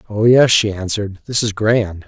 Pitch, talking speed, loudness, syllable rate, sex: 105 Hz, 200 wpm, -15 LUFS, 5.1 syllables/s, male